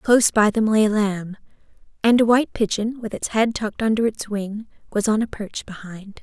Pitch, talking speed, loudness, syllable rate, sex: 215 Hz, 210 wpm, -21 LUFS, 5.3 syllables/s, female